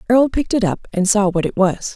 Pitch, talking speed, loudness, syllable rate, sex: 210 Hz, 275 wpm, -17 LUFS, 6.5 syllables/s, female